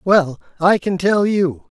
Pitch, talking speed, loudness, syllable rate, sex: 175 Hz, 165 wpm, -17 LUFS, 3.6 syllables/s, male